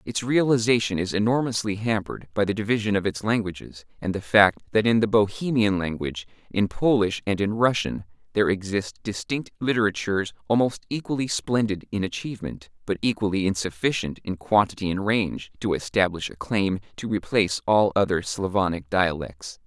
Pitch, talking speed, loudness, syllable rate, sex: 100 Hz, 155 wpm, -24 LUFS, 5.5 syllables/s, male